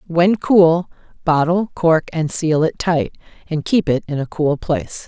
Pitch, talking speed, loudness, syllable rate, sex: 165 Hz, 175 wpm, -17 LUFS, 4.1 syllables/s, female